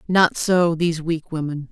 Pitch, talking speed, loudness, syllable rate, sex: 165 Hz, 175 wpm, -20 LUFS, 4.5 syllables/s, female